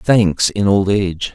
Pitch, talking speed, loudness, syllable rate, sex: 100 Hz, 180 wpm, -15 LUFS, 3.8 syllables/s, male